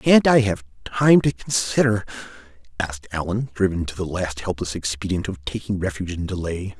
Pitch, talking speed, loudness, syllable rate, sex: 95 Hz, 170 wpm, -22 LUFS, 5.4 syllables/s, male